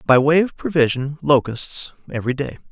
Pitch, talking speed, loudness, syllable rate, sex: 140 Hz, 155 wpm, -19 LUFS, 5.3 syllables/s, male